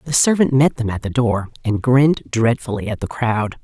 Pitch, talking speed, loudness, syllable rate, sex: 120 Hz, 215 wpm, -18 LUFS, 5.2 syllables/s, female